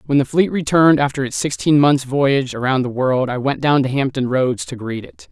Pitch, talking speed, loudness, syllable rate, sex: 135 Hz, 235 wpm, -17 LUFS, 5.4 syllables/s, male